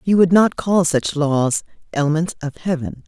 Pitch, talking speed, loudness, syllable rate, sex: 160 Hz, 175 wpm, -18 LUFS, 4.6 syllables/s, female